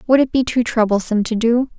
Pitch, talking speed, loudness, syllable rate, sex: 235 Hz, 235 wpm, -17 LUFS, 6.3 syllables/s, female